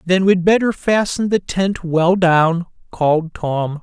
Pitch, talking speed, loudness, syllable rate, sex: 180 Hz, 155 wpm, -16 LUFS, 3.7 syllables/s, male